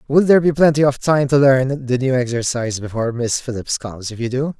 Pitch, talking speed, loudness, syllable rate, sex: 130 Hz, 235 wpm, -17 LUFS, 6.1 syllables/s, male